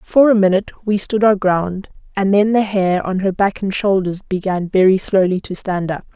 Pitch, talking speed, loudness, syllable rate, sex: 195 Hz, 215 wpm, -16 LUFS, 5.1 syllables/s, female